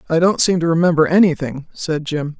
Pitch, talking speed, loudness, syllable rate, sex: 160 Hz, 200 wpm, -16 LUFS, 5.6 syllables/s, female